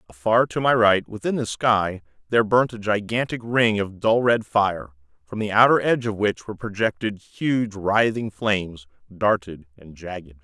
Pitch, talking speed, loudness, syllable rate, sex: 105 Hz, 170 wpm, -21 LUFS, 4.8 syllables/s, male